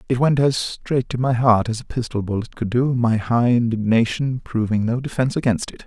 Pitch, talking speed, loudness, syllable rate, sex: 120 Hz, 215 wpm, -20 LUFS, 5.3 syllables/s, male